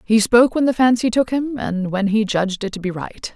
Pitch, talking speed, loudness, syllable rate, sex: 220 Hz, 270 wpm, -18 LUFS, 5.6 syllables/s, female